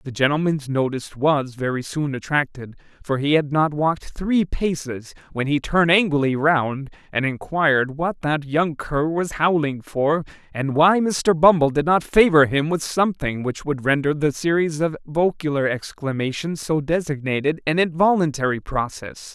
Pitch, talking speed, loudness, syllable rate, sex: 150 Hz, 160 wpm, -21 LUFS, 4.7 syllables/s, male